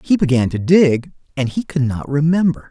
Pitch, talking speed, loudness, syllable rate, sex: 145 Hz, 200 wpm, -17 LUFS, 5.0 syllables/s, male